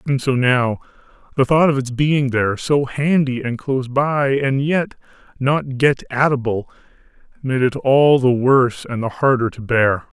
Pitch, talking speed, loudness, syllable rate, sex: 130 Hz, 175 wpm, -17 LUFS, 4.4 syllables/s, male